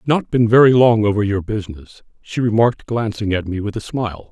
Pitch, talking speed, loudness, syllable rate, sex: 110 Hz, 225 wpm, -17 LUFS, 6.1 syllables/s, male